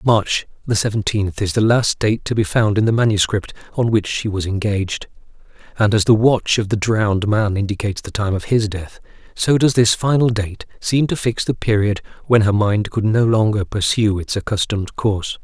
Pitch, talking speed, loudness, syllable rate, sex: 105 Hz, 200 wpm, -18 LUFS, 5.1 syllables/s, male